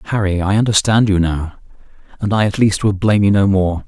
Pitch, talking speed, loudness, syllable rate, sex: 100 Hz, 230 wpm, -15 LUFS, 5.8 syllables/s, male